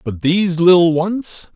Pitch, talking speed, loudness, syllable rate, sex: 175 Hz, 155 wpm, -14 LUFS, 4.1 syllables/s, male